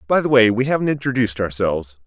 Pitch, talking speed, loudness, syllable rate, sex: 115 Hz, 205 wpm, -18 LUFS, 7.0 syllables/s, male